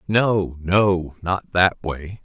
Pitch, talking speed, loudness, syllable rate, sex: 90 Hz, 135 wpm, -20 LUFS, 2.5 syllables/s, male